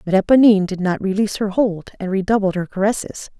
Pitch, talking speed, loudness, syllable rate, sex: 200 Hz, 195 wpm, -18 LUFS, 6.7 syllables/s, female